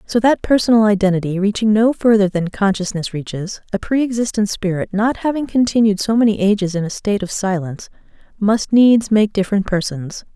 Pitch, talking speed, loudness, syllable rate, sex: 205 Hz, 175 wpm, -17 LUFS, 5.6 syllables/s, female